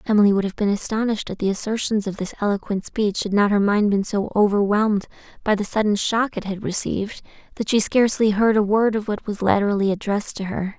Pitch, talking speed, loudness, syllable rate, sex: 205 Hz, 215 wpm, -21 LUFS, 6.1 syllables/s, female